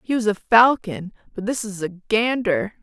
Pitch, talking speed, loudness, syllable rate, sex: 210 Hz, 190 wpm, -20 LUFS, 4.6 syllables/s, female